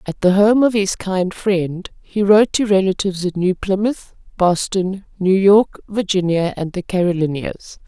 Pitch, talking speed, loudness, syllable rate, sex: 190 Hz, 160 wpm, -17 LUFS, 4.5 syllables/s, female